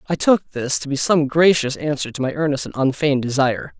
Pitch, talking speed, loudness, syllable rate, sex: 145 Hz, 220 wpm, -19 LUFS, 5.8 syllables/s, male